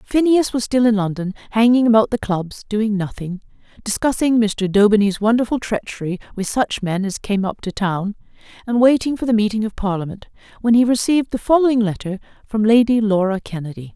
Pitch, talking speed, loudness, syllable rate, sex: 215 Hz, 175 wpm, -18 LUFS, 5.6 syllables/s, female